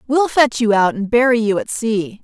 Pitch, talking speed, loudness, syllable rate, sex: 230 Hz, 240 wpm, -16 LUFS, 4.8 syllables/s, female